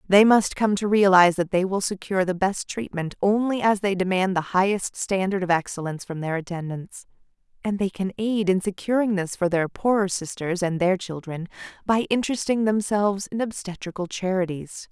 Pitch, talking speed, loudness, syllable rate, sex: 190 Hz, 175 wpm, -23 LUFS, 5.4 syllables/s, female